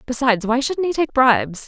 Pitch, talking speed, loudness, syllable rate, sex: 255 Hz, 215 wpm, -18 LUFS, 5.9 syllables/s, female